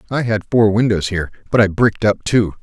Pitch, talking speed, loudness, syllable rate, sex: 105 Hz, 230 wpm, -16 LUFS, 6.2 syllables/s, male